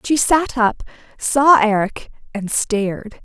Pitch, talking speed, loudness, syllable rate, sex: 235 Hz, 130 wpm, -17 LUFS, 3.6 syllables/s, female